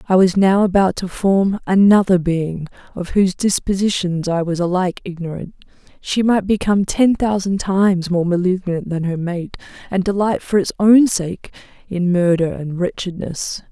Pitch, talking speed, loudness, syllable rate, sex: 185 Hz, 160 wpm, -17 LUFS, 4.8 syllables/s, female